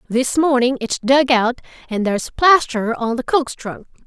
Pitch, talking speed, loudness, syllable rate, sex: 255 Hz, 175 wpm, -17 LUFS, 4.5 syllables/s, female